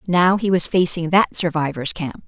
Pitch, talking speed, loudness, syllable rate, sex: 170 Hz, 185 wpm, -18 LUFS, 4.9 syllables/s, female